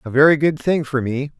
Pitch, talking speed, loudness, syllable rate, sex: 140 Hz, 255 wpm, -18 LUFS, 5.7 syllables/s, male